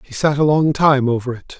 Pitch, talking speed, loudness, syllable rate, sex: 140 Hz, 265 wpm, -16 LUFS, 5.4 syllables/s, male